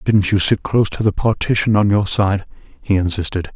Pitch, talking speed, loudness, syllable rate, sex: 100 Hz, 200 wpm, -17 LUFS, 5.3 syllables/s, male